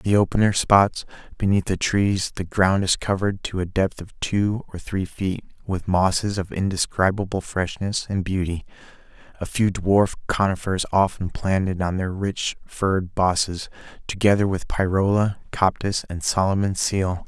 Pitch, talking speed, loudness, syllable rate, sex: 95 Hz, 155 wpm, -22 LUFS, 4.6 syllables/s, male